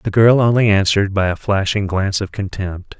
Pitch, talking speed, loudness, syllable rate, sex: 100 Hz, 200 wpm, -16 LUFS, 5.4 syllables/s, male